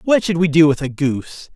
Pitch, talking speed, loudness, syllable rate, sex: 160 Hz, 270 wpm, -16 LUFS, 5.6 syllables/s, male